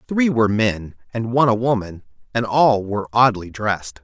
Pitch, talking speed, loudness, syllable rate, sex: 110 Hz, 180 wpm, -19 LUFS, 5.3 syllables/s, male